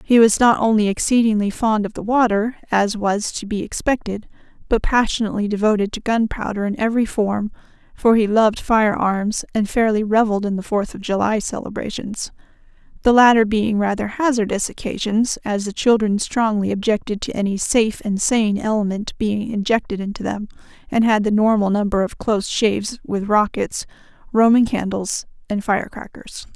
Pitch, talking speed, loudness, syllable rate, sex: 215 Hz, 155 wpm, -19 LUFS, 5.3 syllables/s, female